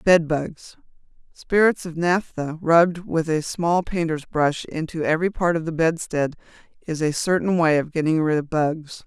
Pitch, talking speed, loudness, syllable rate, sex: 165 Hz, 165 wpm, -22 LUFS, 4.7 syllables/s, female